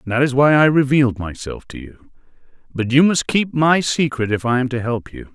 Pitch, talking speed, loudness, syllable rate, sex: 135 Hz, 225 wpm, -17 LUFS, 5.2 syllables/s, male